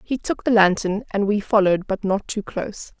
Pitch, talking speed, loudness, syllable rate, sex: 205 Hz, 220 wpm, -21 LUFS, 5.4 syllables/s, female